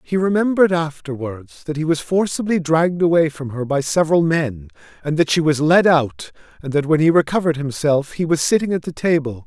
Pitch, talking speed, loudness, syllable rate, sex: 155 Hz, 205 wpm, -18 LUFS, 5.6 syllables/s, male